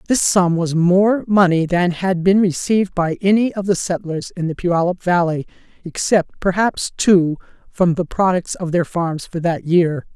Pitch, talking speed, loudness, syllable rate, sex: 180 Hz, 175 wpm, -17 LUFS, 4.4 syllables/s, female